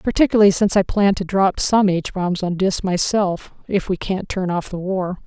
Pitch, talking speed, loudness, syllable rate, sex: 190 Hz, 205 wpm, -19 LUFS, 5.0 syllables/s, female